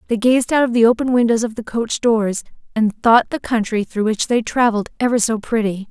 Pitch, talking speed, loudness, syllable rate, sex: 230 Hz, 225 wpm, -17 LUFS, 5.5 syllables/s, female